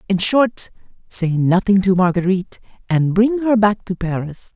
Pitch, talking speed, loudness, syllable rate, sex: 195 Hz, 160 wpm, -17 LUFS, 4.6 syllables/s, female